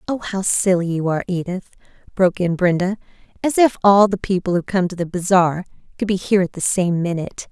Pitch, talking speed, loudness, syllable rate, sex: 185 Hz, 210 wpm, -18 LUFS, 6.0 syllables/s, female